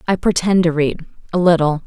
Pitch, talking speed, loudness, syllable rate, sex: 170 Hz, 160 wpm, -16 LUFS, 6.0 syllables/s, female